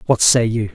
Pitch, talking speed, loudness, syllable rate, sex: 115 Hz, 240 wpm, -15 LUFS, 5.2 syllables/s, male